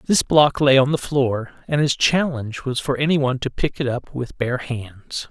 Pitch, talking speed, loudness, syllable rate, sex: 135 Hz, 215 wpm, -20 LUFS, 4.5 syllables/s, male